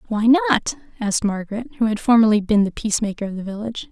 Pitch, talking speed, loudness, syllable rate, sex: 215 Hz, 200 wpm, -20 LUFS, 7.7 syllables/s, female